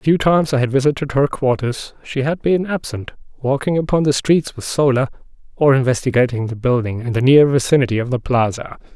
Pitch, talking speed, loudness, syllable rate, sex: 135 Hz, 195 wpm, -17 LUFS, 5.7 syllables/s, male